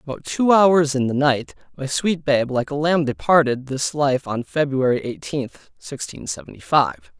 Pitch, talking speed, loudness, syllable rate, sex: 140 Hz, 175 wpm, -20 LUFS, 4.5 syllables/s, male